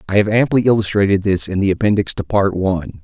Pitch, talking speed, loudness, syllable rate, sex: 100 Hz, 215 wpm, -16 LUFS, 6.3 syllables/s, male